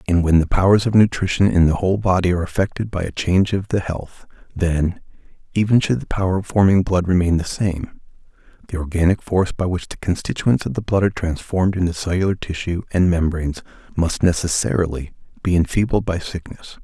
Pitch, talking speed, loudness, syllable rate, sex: 90 Hz, 185 wpm, -19 LUFS, 5.9 syllables/s, male